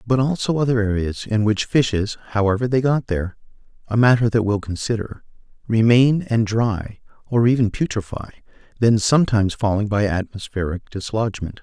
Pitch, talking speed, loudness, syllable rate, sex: 110 Hz, 135 wpm, -20 LUFS, 5.3 syllables/s, male